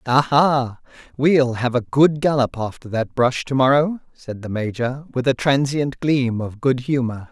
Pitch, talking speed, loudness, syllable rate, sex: 130 Hz, 170 wpm, -19 LUFS, 4.2 syllables/s, male